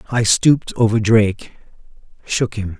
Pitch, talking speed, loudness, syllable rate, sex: 110 Hz, 130 wpm, -16 LUFS, 4.8 syllables/s, male